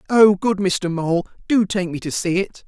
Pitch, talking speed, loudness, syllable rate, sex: 190 Hz, 225 wpm, -19 LUFS, 4.5 syllables/s, male